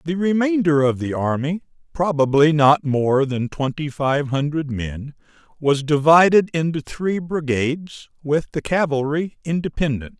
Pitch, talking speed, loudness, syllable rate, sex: 150 Hz, 130 wpm, -20 LUFS, 4.4 syllables/s, male